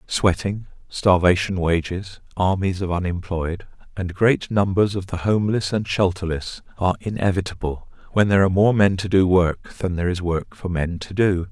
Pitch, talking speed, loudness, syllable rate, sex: 95 Hz, 165 wpm, -21 LUFS, 5.1 syllables/s, male